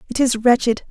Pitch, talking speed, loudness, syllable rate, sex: 240 Hz, 200 wpm, -17 LUFS, 5.6 syllables/s, female